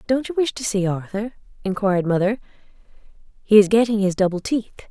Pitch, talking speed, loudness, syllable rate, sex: 210 Hz, 170 wpm, -20 LUFS, 4.9 syllables/s, female